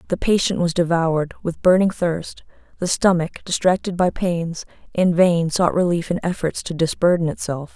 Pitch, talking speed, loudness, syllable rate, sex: 175 Hz, 165 wpm, -20 LUFS, 5.0 syllables/s, female